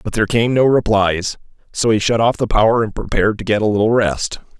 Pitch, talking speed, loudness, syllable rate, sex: 110 Hz, 235 wpm, -16 LUFS, 6.0 syllables/s, male